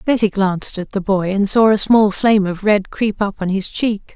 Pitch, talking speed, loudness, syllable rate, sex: 200 Hz, 245 wpm, -16 LUFS, 4.9 syllables/s, female